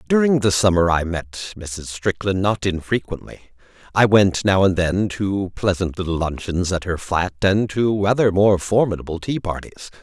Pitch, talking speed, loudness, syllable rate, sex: 95 Hz, 170 wpm, -20 LUFS, 4.7 syllables/s, male